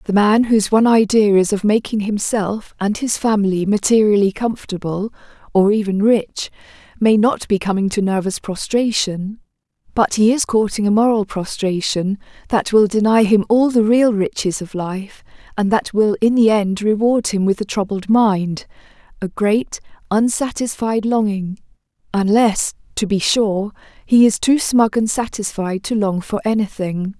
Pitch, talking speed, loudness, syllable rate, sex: 210 Hz, 155 wpm, -17 LUFS, 4.6 syllables/s, female